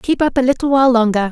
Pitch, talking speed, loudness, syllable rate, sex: 250 Hz, 275 wpm, -14 LUFS, 7.1 syllables/s, female